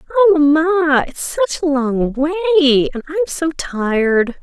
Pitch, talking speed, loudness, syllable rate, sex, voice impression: 295 Hz, 165 wpm, -16 LUFS, 4.6 syllables/s, female, feminine, slightly adult-like, muffled, calm, slightly reassuring, slightly kind